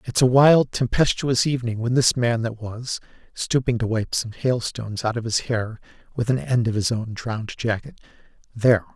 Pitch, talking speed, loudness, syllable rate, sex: 120 Hz, 190 wpm, -22 LUFS, 5.1 syllables/s, male